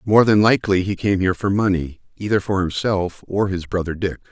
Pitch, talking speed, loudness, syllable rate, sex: 95 Hz, 210 wpm, -19 LUFS, 5.7 syllables/s, male